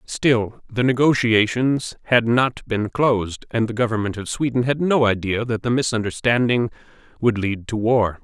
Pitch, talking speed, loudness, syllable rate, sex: 115 Hz, 160 wpm, -20 LUFS, 4.7 syllables/s, male